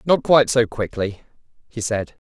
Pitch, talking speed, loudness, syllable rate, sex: 120 Hz, 160 wpm, -20 LUFS, 4.9 syllables/s, male